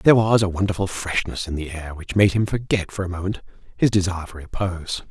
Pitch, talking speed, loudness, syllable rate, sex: 95 Hz, 225 wpm, -22 LUFS, 6.2 syllables/s, male